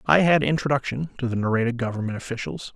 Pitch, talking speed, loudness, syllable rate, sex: 130 Hz, 175 wpm, -24 LUFS, 6.7 syllables/s, male